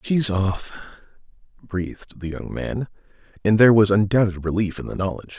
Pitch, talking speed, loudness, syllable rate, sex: 100 Hz, 155 wpm, -21 LUFS, 5.5 syllables/s, male